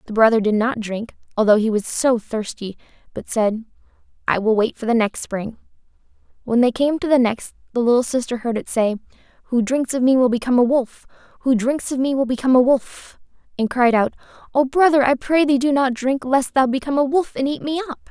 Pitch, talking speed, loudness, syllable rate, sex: 250 Hz, 220 wpm, -19 LUFS, 5.7 syllables/s, female